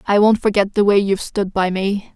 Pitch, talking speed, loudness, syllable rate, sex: 200 Hz, 250 wpm, -17 LUFS, 5.5 syllables/s, female